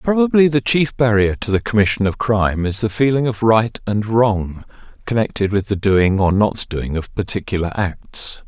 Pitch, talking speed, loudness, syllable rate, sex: 110 Hz, 185 wpm, -17 LUFS, 4.8 syllables/s, male